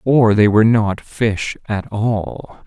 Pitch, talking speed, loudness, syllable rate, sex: 105 Hz, 160 wpm, -16 LUFS, 3.3 syllables/s, male